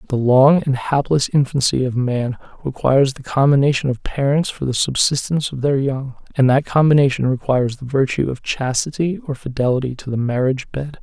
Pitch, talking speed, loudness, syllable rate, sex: 135 Hz, 175 wpm, -18 LUFS, 5.5 syllables/s, male